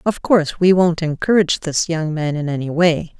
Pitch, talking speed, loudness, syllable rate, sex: 165 Hz, 205 wpm, -17 LUFS, 5.3 syllables/s, female